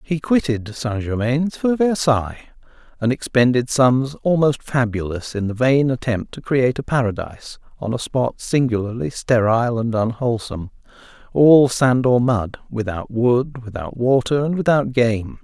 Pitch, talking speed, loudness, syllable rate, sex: 125 Hz, 145 wpm, -19 LUFS, 4.7 syllables/s, male